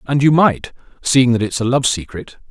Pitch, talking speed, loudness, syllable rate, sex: 125 Hz, 190 wpm, -15 LUFS, 5.0 syllables/s, male